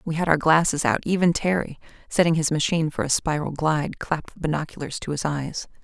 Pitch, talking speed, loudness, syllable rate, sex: 155 Hz, 205 wpm, -23 LUFS, 6.1 syllables/s, female